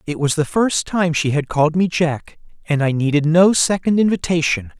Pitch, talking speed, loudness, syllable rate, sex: 165 Hz, 200 wpm, -17 LUFS, 5.0 syllables/s, male